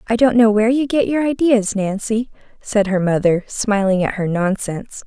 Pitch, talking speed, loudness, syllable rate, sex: 215 Hz, 190 wpm, -17 LUFS, 5.0 syllables/s, female